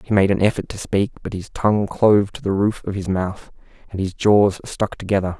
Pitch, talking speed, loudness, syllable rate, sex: 100 Hz, 235 wpm, -20 LUFS, 5.5 syllables/s, male